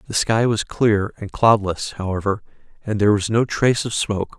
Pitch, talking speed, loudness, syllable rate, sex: 105 Hz, 190 wpm, -20 LUFS, 5.4 syllables/s, male